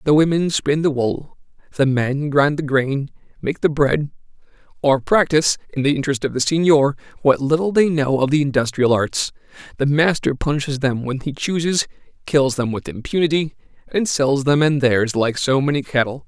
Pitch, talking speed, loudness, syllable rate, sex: 140 Hz, 180 wpm, -19 LUFS, 5.1 syllables/s, male